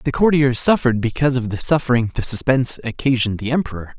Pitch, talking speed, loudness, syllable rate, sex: 125 Hz, 180 wpm, -18 LUFS, 6.9 syllables/s, male